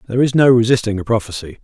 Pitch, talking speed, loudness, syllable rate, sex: 115 Hz, 220 wpm, -15 LUFS, 7.6 syllables/s, male